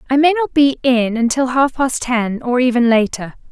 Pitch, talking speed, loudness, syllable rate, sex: 255 Hz, 205 wpm, -15 LUFS, 4.8 syllables/s, female